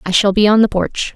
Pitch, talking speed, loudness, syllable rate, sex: 200 Hz, 310 wpm, -14 LUFS, 5.7 syllables/s, female